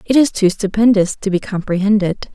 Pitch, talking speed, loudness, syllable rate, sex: 200 Hz, 180 wpm, -16 LUFS, 5.4 syllables/s, female